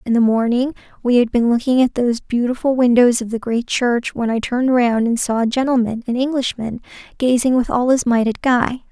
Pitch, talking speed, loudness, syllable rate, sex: 240 Hz, 200 wpm, -17 LUFS, 5.5 syllables/s, female